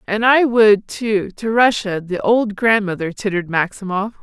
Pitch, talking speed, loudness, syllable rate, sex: 210 Hz, 155 wpm, -17 LUFS, 4.5 syllables/s, female